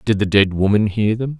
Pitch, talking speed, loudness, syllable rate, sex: 105 Hz, 260 wpm, -17 LUFS, 5.4 syllables/s, male